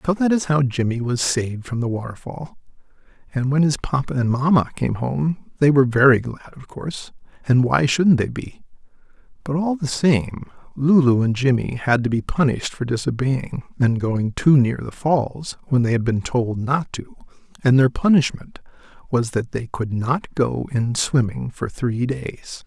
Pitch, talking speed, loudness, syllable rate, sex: 130 Hz, 185 wpm, -20 LUFS, 4.7 syllables/s, male